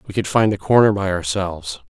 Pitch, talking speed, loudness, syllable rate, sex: 95 Hz, 220 wpm, -18 LUFS, 6.0 syllables/s, male